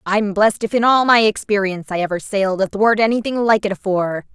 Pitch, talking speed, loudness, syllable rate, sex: 205 Hz, 205 wpm, -17 LUFS, 6.3 syllables/s, female